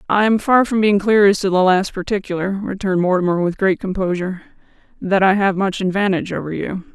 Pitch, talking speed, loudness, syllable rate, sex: 190 Hz, 200 wpm, -17 LUFS, 6.1 syllables/s, female